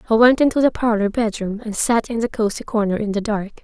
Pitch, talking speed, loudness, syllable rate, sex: 220 Hz, 250 wpm, -19 LUFS, 6.0 syllables/s, female